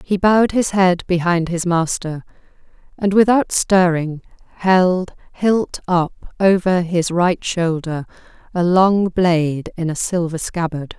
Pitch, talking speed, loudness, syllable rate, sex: 180 Hz, 130 wpm, -17 LUFS, 3.8 syllables/s, female